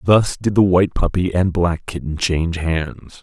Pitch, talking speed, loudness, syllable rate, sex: 90 Hz, 185 wpm, -18 LUFS, 4.6 syllables/s, male